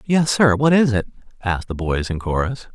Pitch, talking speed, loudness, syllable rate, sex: 115 Hz, 220 wpm, -19 LUFS, 5.3 syllables/s, male